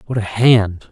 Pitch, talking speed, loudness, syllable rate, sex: 110 Hz, 195 wpm, -15 LUFS, 3.9 syllables/s, male